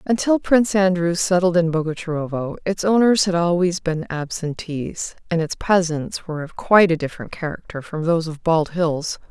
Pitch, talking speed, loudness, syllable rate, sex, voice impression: 170 Hz, 170 wpm, -20 LUFS, 5.2 syllables/s, female, very feminine, very adult-like, middle-aged, thin, slightly tensed, slightly weak, bright, soft, clear, fluent, cute, very intellectual, very refreshing, sincere, very calm, friendly, reassuring, unique, very elegant, sweet, slightly lively, kind, slightly modest, light